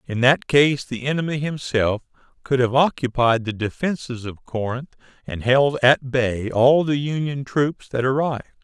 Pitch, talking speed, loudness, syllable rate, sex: 130 Hz, 160 wpm, -21 LUFS, 4.5 syllables/s, male